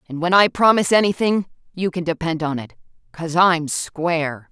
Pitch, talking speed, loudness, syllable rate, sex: 170 Hz, 175 wpm, -19 LUFS, 5.2 syllables/s, female